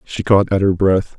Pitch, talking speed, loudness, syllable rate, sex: 95 Hz, 250 wpm, -15 LUFS, 4.6 syllables/s, male